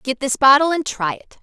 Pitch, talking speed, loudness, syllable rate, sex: 270 Hz, 250 wpm, -17 LUFS, 5.4 syllables/s, female